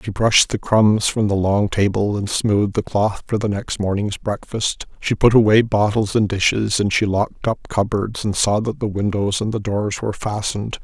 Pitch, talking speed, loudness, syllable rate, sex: 105 Hz, 210 wpm, -19 LUFS, 5.0 syllables/s, male